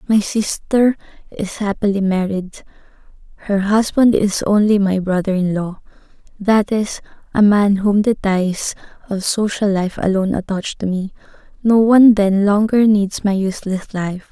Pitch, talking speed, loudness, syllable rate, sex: 200 Hz, 145 wpm, -16 LUFS, 4.5 syllables/s, female